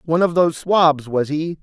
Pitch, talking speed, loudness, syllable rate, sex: 160 Hz, 220 wpm, -17 LUFS, 5.3 syllables/s, male